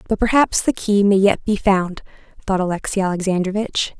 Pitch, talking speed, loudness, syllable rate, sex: 195 Hz, 165 wpm, -18 LUFS, 5.3 syllables/s, female